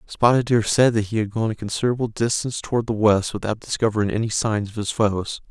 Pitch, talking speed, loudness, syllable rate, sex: 110 Hz, 220 wpm, -21 LUFS, 6.2 syllables/s, male